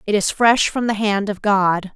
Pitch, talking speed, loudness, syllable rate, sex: 205 Hz, 245 wpm, -18 LUFS, 4.4 syllables/s, female